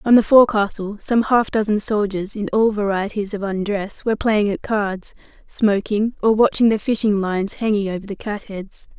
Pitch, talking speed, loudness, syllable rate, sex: 210 Hz, 175 wpm, -19 LUFS, 5.0 syllables/s, female